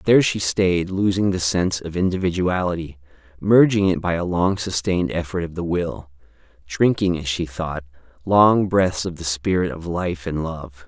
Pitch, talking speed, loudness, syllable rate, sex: 90 Hz, 170 wpm, -20 LUFS, 4.8 syllables/s, male